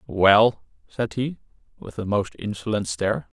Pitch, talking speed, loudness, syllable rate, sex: 100 Hz, 140 wpm, -23 LUFS, 4.4 syllables/s, male